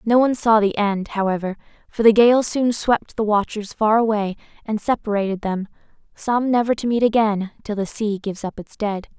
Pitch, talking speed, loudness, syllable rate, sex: 215 Hz, 195 wpm, -20 LUFS, 5.2 syllables/s, female